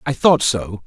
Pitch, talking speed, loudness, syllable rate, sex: 120 Hz, 205 wpm, -17 LUFS, 4.1 syllables/s, male